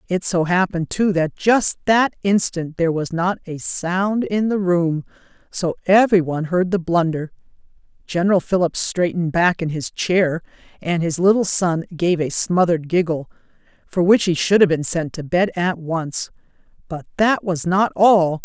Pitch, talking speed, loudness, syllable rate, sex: 175 Hz, 165 wpm, -19 LUFS, 4.6 syllables/s, female